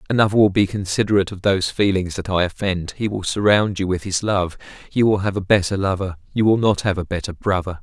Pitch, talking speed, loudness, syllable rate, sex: 95 Hz, 230 wpm, -20 LUFS, 6.2 syllables/s, male